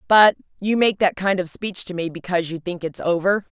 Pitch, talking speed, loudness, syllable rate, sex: 185 Hz, 235 wpm, -21 LUFS, 5.5 syllables/s, female